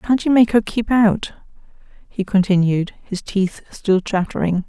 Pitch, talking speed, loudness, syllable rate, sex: 205 Hz, 155 wpm, -18 LUFS, 4.3 syllables/s, female